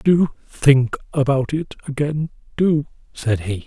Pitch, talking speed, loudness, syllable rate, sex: 140 Hz, 115 wpm, -20 LUFS, 3.8 syllables/s, male